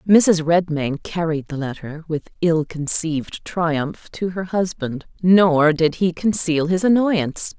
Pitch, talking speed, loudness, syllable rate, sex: 165 Hz, 140 wpm, -20 LUFS, 3.9 syllables/s, female